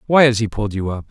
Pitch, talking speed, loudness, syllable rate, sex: 110 Hz, 325 wpm, -18 LUFS, 7.5 syllables/s, male